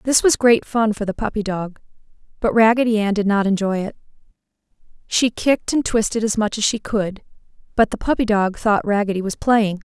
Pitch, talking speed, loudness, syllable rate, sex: 215 Hz, 195 wpm, -19 LUFS, 5.4 syllables/s, female